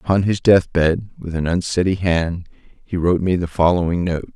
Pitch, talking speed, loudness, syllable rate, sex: 90 Hz, 195 wpm, -18 LUFS, 4.9 syllables/s, male